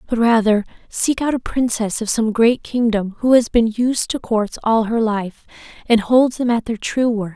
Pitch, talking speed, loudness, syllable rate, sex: 225 Hz, 210 wpm, -18 LUFS, 4.5 syllables/s, female